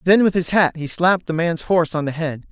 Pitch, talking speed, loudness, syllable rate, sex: 170 Hz, 285 wpm, -19 LUFS, 6.0 syllables/s, male